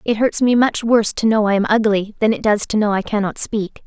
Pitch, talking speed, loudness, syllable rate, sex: 215 Hz, 280 wpm, -17 LUFS, 5.7 syllables/s, female